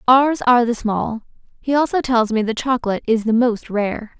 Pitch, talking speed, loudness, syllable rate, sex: 235 Hz, 200 wpm, -18 LUFS, 5.3 syllables/s, female